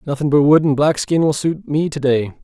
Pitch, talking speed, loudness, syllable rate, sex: 145 Hz, 270 wpm, -16 LUFS, 5.2 syllables/s, male